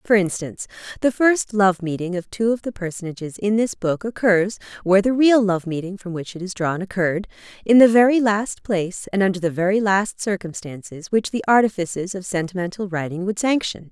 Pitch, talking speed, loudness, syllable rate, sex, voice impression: 195 Hz, 195 wpm, -20 LUFS, 4.7 syllables/s, female, feminine, adult-like, tensed, powerful, bright, clear, fluent, intellectual, friendly, elegant, slightly sharp